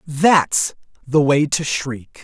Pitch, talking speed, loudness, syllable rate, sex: 145 Hz, 135 wpm, -17 LUFS, 2.7 syllables/s, male